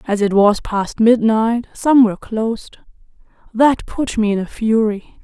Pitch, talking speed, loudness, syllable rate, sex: 220 Hz, 160 wpm, -16 LUFS, 4.2 syllables/s, female